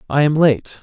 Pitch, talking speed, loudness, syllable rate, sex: 145 Hz, 215 wpm, -15 LUFS, 4.6 syllables/s, male